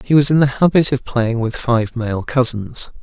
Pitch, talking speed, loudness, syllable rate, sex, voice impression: 125 Hz, 220 wpm, -16 LUFS, 4.6 syllables/s, male, masculine, adult-like, relaxed, slightly weak, muffled, raspy, intellectual, calm, slightly mature, slightly reassuring, wild, kind, modest